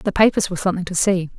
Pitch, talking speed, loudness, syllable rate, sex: 185 Hz, 260 wpm, -19 LUFS, 7.8 syllables/s, female